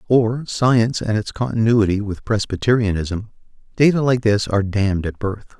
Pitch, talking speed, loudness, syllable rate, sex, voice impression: 110 Hz, 140 wpm, -19 LUFS, 5.2 syllables/s, male, very masculine, very adult-like, middle-aged, very thick, relaxed, slightly weak, slightly dark, soft, muffled, slightly fluent, slightly raspy, cool, very intellectual, very sincere, very calm, very mature, very friendly, reassuring, slightly unique, elegant, very sweet, slightly lively, very kind, slightly modest